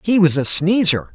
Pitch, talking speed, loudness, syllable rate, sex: 175 Hz, 210 wpm, -15 LUFS, 4.8 syllables/s, male